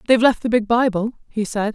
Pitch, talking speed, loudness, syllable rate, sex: 225 Hz, 240 wpm, -19 LUFS, 6.1 syllables/s, female